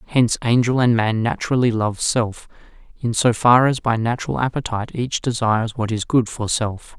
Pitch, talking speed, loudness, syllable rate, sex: 115 Hz, 180 wpm, -19 LUFS, 5.3 syllables/s, male